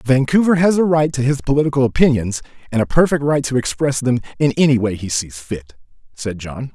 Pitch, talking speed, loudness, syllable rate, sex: 130 Hz, 205 wpm, -17 LUFS, 5.7 syllables/s, male